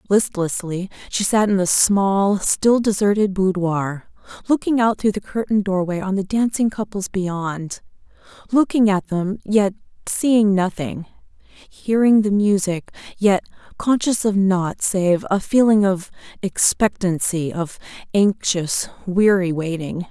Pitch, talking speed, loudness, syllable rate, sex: 195 Hz, 125 wpm, -19 LUFS, 4.0 syllables/s, female